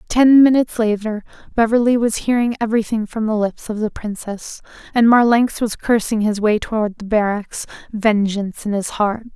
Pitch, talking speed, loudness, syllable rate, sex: 220 Hz, 165 wpm, -17 LUFS, 5.2 syllables/s, female